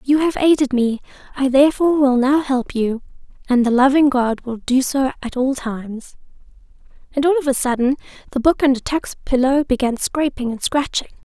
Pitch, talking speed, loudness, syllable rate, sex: 265 Hz, 180 wpm, -18 LUFS, 5.3 syllables/s, female